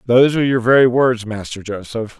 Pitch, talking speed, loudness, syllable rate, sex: 120 Hz, 190 wpm, -16 LUFS, 5.9 syllables/s, male